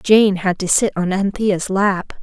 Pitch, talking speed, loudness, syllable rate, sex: 195 Hz, 190 wpm, -17 LUFS, 3.8 syllables/s, female